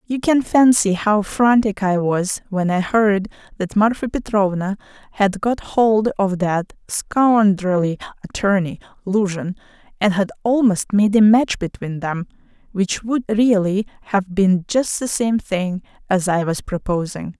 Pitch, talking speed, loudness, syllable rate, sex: 200 Hz, 140 wpm, -18 LUFS, 4.0 syllables/s, female